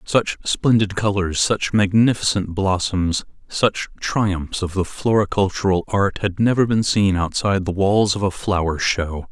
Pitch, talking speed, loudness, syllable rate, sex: 100 Hz, 150 wpm, -19 LUFS, 4.2 syllables/s, male